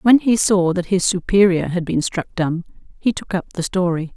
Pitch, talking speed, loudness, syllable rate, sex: 185 Hz, 215 wpm, -19 LUFS, 4.8 syllables/s, female